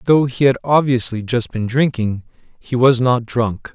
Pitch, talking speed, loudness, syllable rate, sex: 125 Hz, 175 wpm, -17 LUFS, 4.4 syllables/s, male